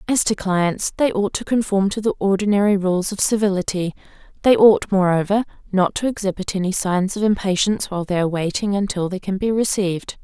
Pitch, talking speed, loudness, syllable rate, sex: 195 Hz, 190 wpm, -19 LUFS, 5.8 syllables/s, female